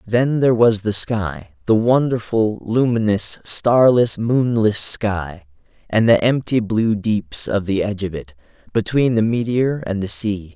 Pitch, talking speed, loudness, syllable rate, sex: 105 Hz, 155 wpm, -18 LUFS, 4.0 syllables/s, male